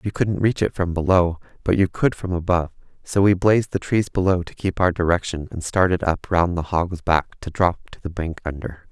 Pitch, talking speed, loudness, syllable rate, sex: 90 Hz, 230 wpm, -21 LUFS, 5.3 syllables/s, male